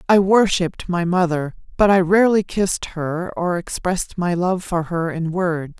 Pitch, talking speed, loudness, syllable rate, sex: 175 Hz, 175 wpm, -19 LUFS, 4.7 syllables/s, female